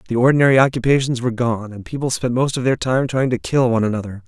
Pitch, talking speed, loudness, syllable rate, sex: 125 Hz, 240 wpm, -18 LUFS, 6.9 syllables/s, male